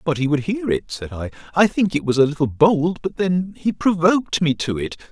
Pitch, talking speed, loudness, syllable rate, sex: 160 Hz, 245 wpm, -20 LUFS, 5.2 syllables/s, male